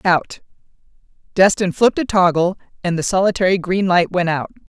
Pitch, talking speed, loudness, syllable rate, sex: 185 Hz, 150 wpm, -17 LUFS, 5.5 syllables/s, female